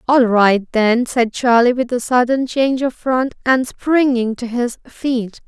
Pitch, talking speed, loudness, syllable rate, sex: 245 Hz, 175 wpm, -16 LUFS, 3.9 syllables/s, female